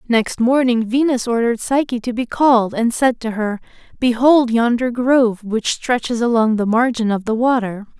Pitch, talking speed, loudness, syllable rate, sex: 235 Hz, 175 wpm, -17 LUFS, 4.9 syllables/s, female